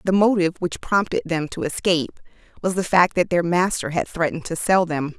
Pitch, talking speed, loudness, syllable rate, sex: 170 Hz, 210 wpm, -21 LUFS, 5.7 syllables/s, female